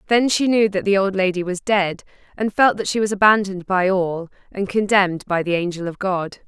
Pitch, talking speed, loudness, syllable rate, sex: 195 Hz, 220 wpm, -19 LUFS, 5.5 syllables/s, female